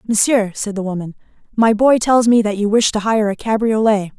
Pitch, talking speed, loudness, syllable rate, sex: 215 Hz, 215 wpm, -16 LUFS, 5.3 syllables/s, female